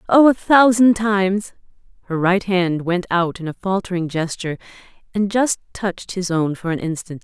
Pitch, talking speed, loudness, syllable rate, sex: 190 Hz, 175 wpm, -19 LUFS, 5.0 syllables/s, female